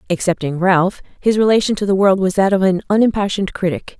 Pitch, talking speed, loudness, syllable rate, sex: 190 Hz, 195 wpm, -16 LUFS, 6.2 syllables/s, female